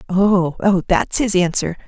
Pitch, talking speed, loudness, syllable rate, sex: 185 Hz, 160 wpm, -17 LUFS, 4.0 syllables/s, female